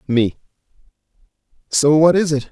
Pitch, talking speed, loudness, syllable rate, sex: 145 Hz, 120 wpm, -16 LUFS, 5.0 syllables/s, male